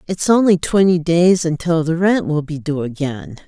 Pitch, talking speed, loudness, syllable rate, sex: 165 Hz, 190 wpm, -16 LUFS, 4.7 syllables/s, female